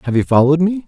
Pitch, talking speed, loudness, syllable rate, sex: 155 Hz, 275 wpm, -14 LUFS, 8.2 syllables/s, male